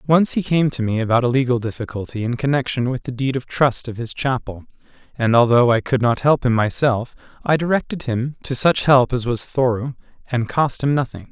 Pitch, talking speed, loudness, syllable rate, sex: 125 Hz, 210 wpm, -19 LUFS, 5.3 syllables/s, male